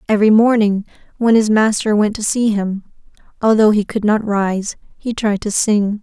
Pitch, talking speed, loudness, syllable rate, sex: 210 Hz, 180 wpm, -15 LUFS, 4.8 syllables/s, female